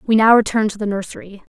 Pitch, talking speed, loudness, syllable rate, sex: 210 Hz, 235 wpm, -16 LUFS, 6.8 syllables/s, female